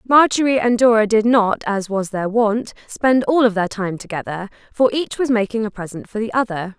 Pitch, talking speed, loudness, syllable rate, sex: 220 Hz, 210 wpm, -18 LUFS, 5.1 syllables/s, female